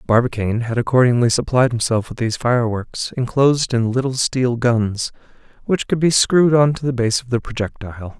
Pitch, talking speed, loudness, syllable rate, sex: 120 Hz, 175 wpm, -18 LUFS, 5.6 syllables/s, male